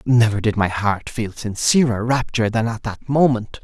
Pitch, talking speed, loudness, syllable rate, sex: 115 Hz, 180 wpm, -19 LUFS, 4.8 syllables/s, male